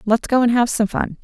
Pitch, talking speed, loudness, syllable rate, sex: 230 Hz, 290 wpm, -18 LUFS, 5.5 syllables/s, female